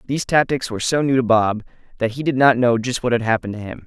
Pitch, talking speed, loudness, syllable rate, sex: 120 Hz, 280 wpm, -19 LUFS, 7.0 syllables/s, male